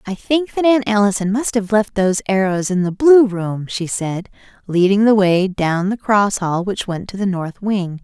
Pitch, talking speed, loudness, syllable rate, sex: 200 Hz, 215 wpm, -17 LUFS, 4.6 syllables/s, female